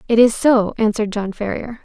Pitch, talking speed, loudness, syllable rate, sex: 220 Hz, 195 wpm, -17 LUFS, 5.7 syllables/s, female